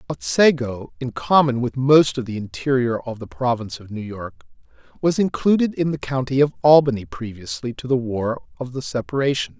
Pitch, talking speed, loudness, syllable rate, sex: 125 Hz, 175 wpm, -20 LUFS, 5.3 syllables/s, male